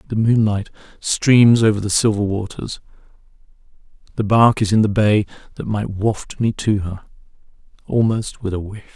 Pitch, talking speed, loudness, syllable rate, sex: 105 Hz, 155 wpm, -18 LUFS, 4.8 syllables/s, male